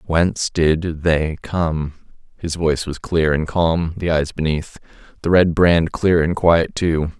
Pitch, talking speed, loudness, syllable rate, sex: 80 Hz, 150 wpm, -18 LUFS, 3.8 syllables/s, male